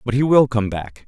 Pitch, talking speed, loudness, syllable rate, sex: 115 Hz, 280 wpm, -17 LUFS, 5.2 syllables/s, male